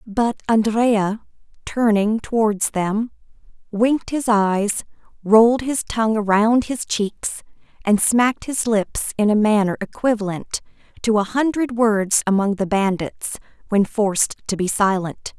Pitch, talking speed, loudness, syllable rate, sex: 215 Hz, 135 wpm, -19 LUFS, 4.2 syllables/s, female